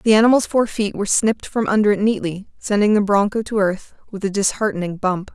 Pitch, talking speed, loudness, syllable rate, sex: 205 Hz, 215 wpm, -18 LUFS, 5.9 syllables/s, female